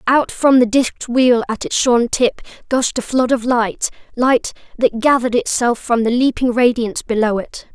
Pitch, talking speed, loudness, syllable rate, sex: 240 Hz, 180 wpm, -16 LUFS, 4.8 syllables/s, female